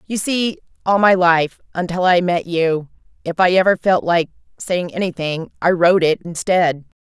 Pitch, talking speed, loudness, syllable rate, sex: 175 Hz, 155 wpm, -17 LUFS, 4.6 syllables/s, female